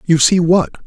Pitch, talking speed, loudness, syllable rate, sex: 165 Hz, 210 wpm, -13 LUFS, 3.9 syllables/s, male